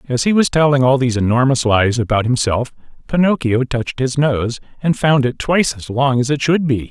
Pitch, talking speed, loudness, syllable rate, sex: 130 Hz, 210 wpm, -16 LUFS, 5.5 syllables/s, male